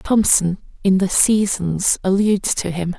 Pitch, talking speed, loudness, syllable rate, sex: 190 Hz, 140 wpm, -17 LUFS, 4.1 syllables/s, female